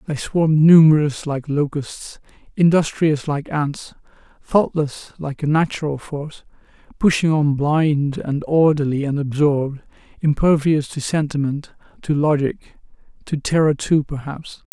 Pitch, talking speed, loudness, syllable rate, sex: 150 Hz, 120 wpm, -19 LUFS, 4.2 syllables/s, male